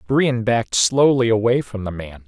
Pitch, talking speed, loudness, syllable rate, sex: 115 Hz, 185 wpm, -18 LUFS, 4.7 syllables/s, male